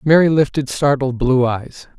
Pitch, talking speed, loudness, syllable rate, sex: 135 Hz, 150 wpm, -16 LUFS, 4.4 syllables/s, male